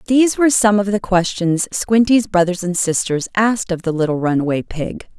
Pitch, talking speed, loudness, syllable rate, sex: 195 Hz, 185 wpm, -17 LUFS, 5.4 syllables/s, female